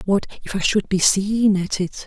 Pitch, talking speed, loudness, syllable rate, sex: 195 Hz, 230 wpm, -20 LUFS, 4.6 syllables/s, female